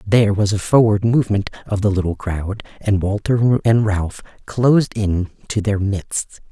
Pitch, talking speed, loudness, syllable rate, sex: 105 Hz, 165 wpm, -18 LUFS, 4.5 syllables/s, male